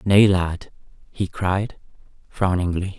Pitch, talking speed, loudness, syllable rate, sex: 90 Hz, 100 wpm, -21 LUFS, 3.5 syllables/s, male